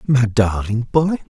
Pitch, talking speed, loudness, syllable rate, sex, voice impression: 120 Hz, 135 wpm, -18 LUFS, 3.6 syllables/s, male, masculine, middle-aged, powerful, intellectual, sincere, slightly calm, wild, slightly strict, slightly sharp